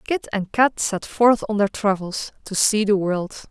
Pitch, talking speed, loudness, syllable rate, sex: 205 Hz, 205 wpm, -21 LUFS, 4.2 syllables/s, female